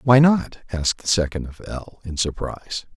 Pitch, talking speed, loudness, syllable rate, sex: 100 Hz, 180 wpm, -22 LUFS, 4.9 syllables/s, male